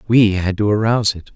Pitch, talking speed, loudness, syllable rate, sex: 105 Hz, 220 wpm, -16 LUFS, 5.9 syllables/s, male